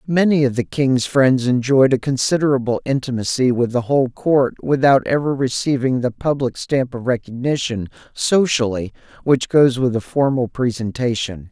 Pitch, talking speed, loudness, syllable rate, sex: 130 Hz, 145 wpm, -18 LUFS, 4.8 syllables/s, male